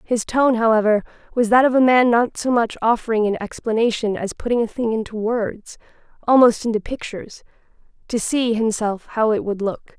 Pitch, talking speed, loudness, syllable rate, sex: 225 Hz, 170 wpm, -19 LUFS, 5.3 syllables/s, female